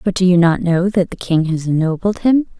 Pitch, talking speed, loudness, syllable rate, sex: 180 Hz, 255 wpm, -16 LUFS, 5.4 syllables/s, female